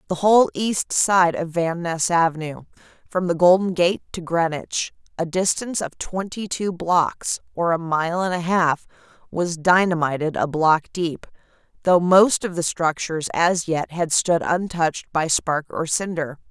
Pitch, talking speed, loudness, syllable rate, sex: 170 Hz, 165 wpm, -21 LUFS, 4.3 syllables/s, female